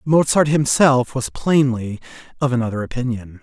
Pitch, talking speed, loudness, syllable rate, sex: 130 Hz, 120 wpm, -18 LUFS, 4.8 syllables/s, male